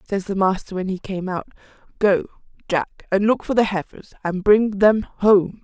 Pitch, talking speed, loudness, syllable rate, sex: 195 Hz, 190 wpm, -20 LUFS, 4.7 syllables/s, female